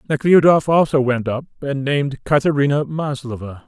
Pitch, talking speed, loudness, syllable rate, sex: 140 Hz, 130 wpm, -17 LUFS, 5.2 syllables/s, male